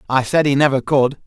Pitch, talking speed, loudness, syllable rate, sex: 135 Hz, 240 wpm, -16 LUFS, 5.8 syllables/s, male